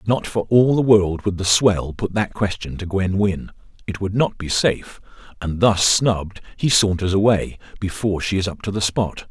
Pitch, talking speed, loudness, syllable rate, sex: 100 Hz, 205 wpm, -19 LUFS, 4.9 syllables/s, male